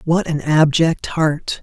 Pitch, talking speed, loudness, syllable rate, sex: 160 Hz, 150 wpm, -17 LUFS, 3.3 syllables/s, male